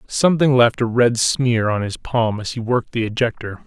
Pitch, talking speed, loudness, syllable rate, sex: 120 Hz, 215 wpm, -18 LUFS, 5.2 syllables/s, male